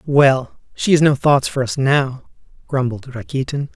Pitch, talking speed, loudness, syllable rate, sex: 135 Hz, 160 wpm, -17 LUFS, 4.2 syllables/s, male